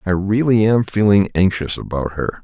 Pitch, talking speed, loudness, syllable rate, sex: 100 Hz, 175 wpm, -17 LUFS, 4.9 syllables/s, male